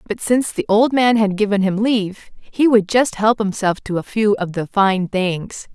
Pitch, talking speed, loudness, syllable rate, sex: 210 Hz, 220 wpm, -17 LUFS, 4.6 syllables/s, female